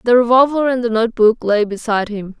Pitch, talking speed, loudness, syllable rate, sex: 230 Hz, 200 wpm, -15 LUFS, 6.2 syllables/s, female